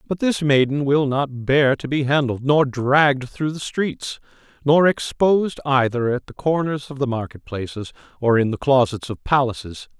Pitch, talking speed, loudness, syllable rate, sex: 135 Hz, 180 wpm, -20 LUFS, 4.7 syllables/s, male